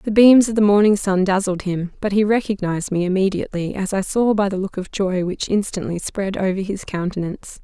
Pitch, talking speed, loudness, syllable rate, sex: 195 Hz, 210 wpm, -19 LUFS, 5.7 syllables/s, female